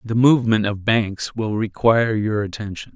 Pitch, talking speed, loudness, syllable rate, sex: 110 Hz, 160 wpm, -19 LUFS, 4.9 syllables/s, male